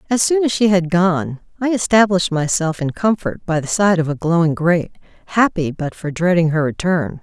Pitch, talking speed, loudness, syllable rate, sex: 180 Hz, 200 wpm, -17 LUFS, 5.3 syllables/s, female